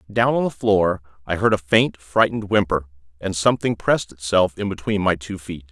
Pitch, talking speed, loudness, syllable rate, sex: 95 Hz, 200 wpm, -21 LUFS, 5.5 syllables/s, male